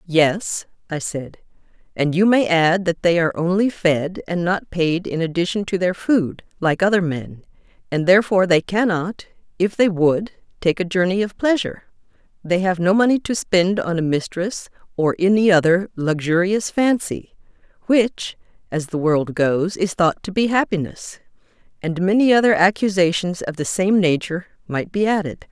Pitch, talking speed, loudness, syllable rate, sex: 180 Hz, 165 wpm, -19 LUFS, 4.8 syllables/s, female